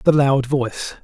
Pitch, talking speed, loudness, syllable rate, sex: 135 Hz, 175 wpm, -19 LUFS, 6.4 syllables/s, male